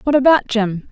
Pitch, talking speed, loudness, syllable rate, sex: 245 Hz, 195 wpm, -15 LUFS, 5.4 syllables/s, female